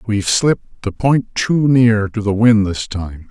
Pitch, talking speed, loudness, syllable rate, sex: 110 Hz, 200 wpm, -15 LUFS, 4.2 syllables/s, male